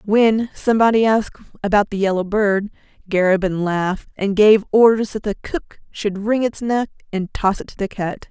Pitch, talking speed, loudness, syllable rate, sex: 205 Hz, 180 wpm, -18 LUFS, 4.9 syllables/s, female